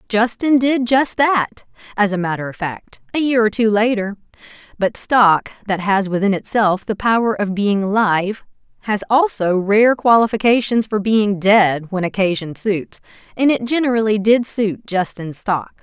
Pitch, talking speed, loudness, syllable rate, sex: 210 Hz, 160 wpm, -17 LUFS, 4.4 syllables/s, female